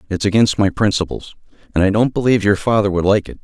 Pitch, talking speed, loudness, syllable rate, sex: 100 Hz, 225 wpm, -16 LUFS, 6.8 syllables/s, male